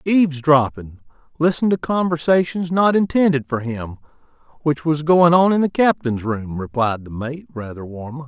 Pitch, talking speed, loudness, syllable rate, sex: 145 Hz, 150 wpm, -18 LUFS, 5.0 syllables/s, male